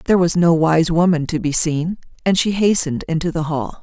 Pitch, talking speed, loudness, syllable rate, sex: 165 Hz, 220 wpm, -17 LUFS, 5.6 syllables/s, female